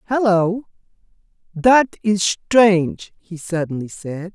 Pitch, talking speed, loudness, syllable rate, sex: 190 Hz, 95 wpm, -18 LUFS, 3.6 syllables/s, female